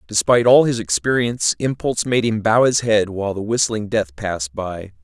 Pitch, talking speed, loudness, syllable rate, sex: 110 Hz, 190 wpm, -18 LUFS, 5.5 syllables/s, male